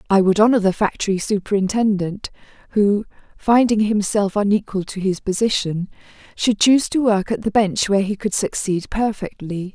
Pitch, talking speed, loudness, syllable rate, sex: 205 Hz, 155 wpm, -19 LUFS, 5.1 syllables/s, female